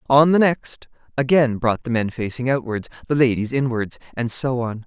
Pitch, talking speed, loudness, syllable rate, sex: 125 Hz, 160 wpm, -20 LUFS, 4.9 syllables/s, female